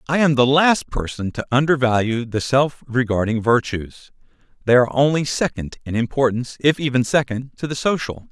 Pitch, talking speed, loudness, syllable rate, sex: 130 Hz, 165 wpm, -19 LUFS, 5.3 syllables/s, male